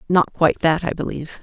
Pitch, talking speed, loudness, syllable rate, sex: 165 Hz, 210 wpm, -20 LUFS, 6.7 syllables/s, female